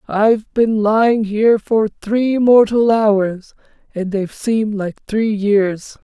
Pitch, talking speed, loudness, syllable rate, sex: 215 Hz, 135 wpm, -16 LUFS, 3.9 syllables/s, female